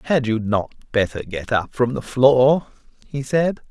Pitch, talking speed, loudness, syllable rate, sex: 125 Hz, 180 wpm, -20 LUFS, 4.4 syllables/s, male